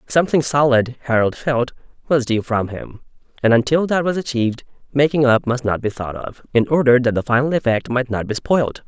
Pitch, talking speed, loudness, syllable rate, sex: 130 Hz, 205 wpm, -18 LUFS, 5.5 syllables/s, male